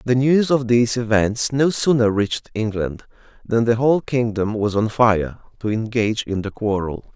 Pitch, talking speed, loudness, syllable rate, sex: 115 Hz, 175 wpm, -19 LUFS, 4.9 syllables/s, male